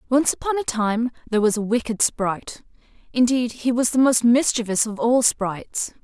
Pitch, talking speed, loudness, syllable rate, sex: 235 Hz, 180 wpm, -21 LUFS, 5.1 syllables/s, female